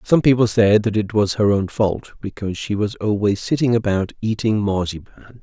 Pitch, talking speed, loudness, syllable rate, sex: 105 Hz, 190 wpm, -19 LUFS, 5.1 syllables/s, male